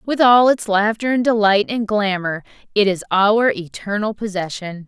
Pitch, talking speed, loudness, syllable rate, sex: 210 Hz, 160 wpm, -17 LUFS, 4.5 syllables/s, female